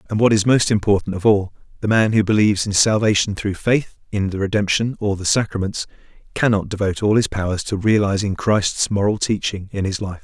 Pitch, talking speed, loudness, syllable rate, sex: 105 Hz, 195 wpm, -19 LUFS, 5.8 syllables/s, male